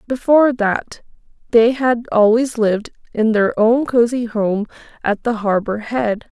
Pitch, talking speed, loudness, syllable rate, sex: 230 Hz, 140 wpm, -17 LUFS, 4.1 syllables/s, female